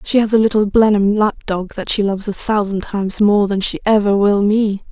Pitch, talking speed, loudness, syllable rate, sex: 205 Hz, 220 wpm, -16 LUFS, 5.3 syllables/s, female